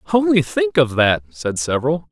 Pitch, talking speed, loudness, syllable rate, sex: 130 Hz, 170 wpm, -18 LUFS, 5.2 syllables/s, male